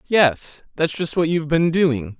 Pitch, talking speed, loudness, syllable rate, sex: 155 Hz, 190 wpm, -19 LUFS, 4.2 syllables/s, male